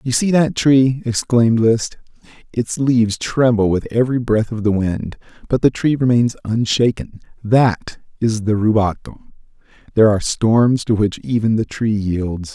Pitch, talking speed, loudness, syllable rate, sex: 115 Hz, 155 wpm, -17 LUFS, 4.5 syllables/s, male